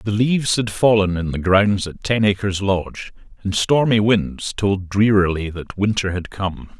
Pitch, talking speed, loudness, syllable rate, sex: 100 Hz, 175 wpm, -19 LUFS, 4.4 syllables/s, male